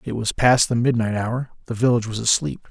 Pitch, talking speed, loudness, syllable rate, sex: 120 Hz, 220 wpm, -20 LUFS, 5.8 syllables/s, male